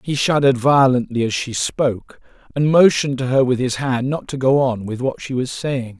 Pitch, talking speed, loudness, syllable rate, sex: 130 Hz, 220 wpm, -18 LUFS, 5.3 syllables/s, male